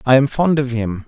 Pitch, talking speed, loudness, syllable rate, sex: 130 Hz, 280 wpm, -17 LUFS, 5.3 syllables/s, male